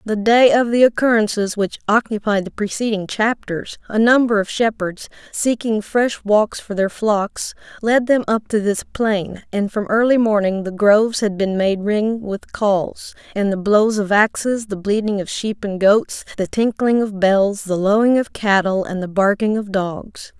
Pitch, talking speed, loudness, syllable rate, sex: 210 Hz, 180 wpm, -18 LUFS, 4.3 syllables/s, female